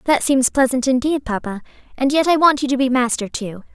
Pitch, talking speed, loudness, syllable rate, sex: 260 Hz, 225 wpm, -17 LUFS, 5.7 syllables/s, female